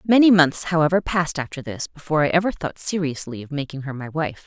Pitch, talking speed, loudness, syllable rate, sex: 160 Hz, 215 wpm, -21 LUFS, 6.2 syllables/s, female